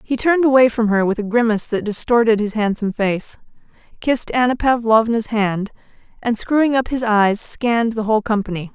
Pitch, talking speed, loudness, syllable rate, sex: 225 Hz, 180 wpm, -18 LUFS, 5.7 syllables/s, female